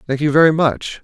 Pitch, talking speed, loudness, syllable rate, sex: 145 Hz, 230 wpm, -15 LUFS, 5.8 syllables/s, male